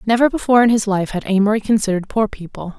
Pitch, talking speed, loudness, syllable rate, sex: 210 Hz, 215 wpm, -17 LUFS, 7.2 syllables/s, female